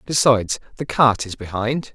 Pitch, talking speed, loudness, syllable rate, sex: 120 Hz, 155 wpm, -20 LUFS, 4.9 syllables/s, male